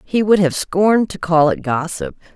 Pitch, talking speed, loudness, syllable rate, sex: 180 Hz, 205 wpm, -16 LUFS, 4.8 syllables/s, female